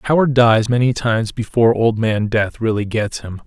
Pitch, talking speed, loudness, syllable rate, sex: 115 Hz, 210 wpm, -16 LUFS, 5.4 syllables/s, male